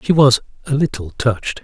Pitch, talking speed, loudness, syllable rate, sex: 130 Hz, 185 wpm, -17 LUFS, 5.5 syllables/s, male